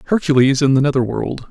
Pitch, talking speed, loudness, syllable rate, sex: 140 Hz, 200 wpm, -16 LUFS, 6.2 syllables/s, male